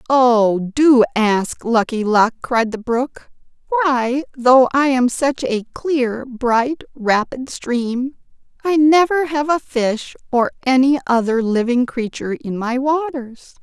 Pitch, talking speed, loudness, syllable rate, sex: 255 Hz, 135 wpm, -17 LUFS, 3.5 syllables/s, female